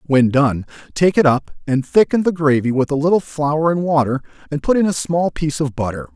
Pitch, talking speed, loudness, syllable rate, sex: 150 Hz, 225 wpm, -17 LUFS, 5.4 syllables/s, male